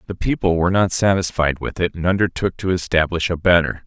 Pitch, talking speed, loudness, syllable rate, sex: 90 Hz, 200 wpm, -19 LUFS, 6.0 syllables/s, male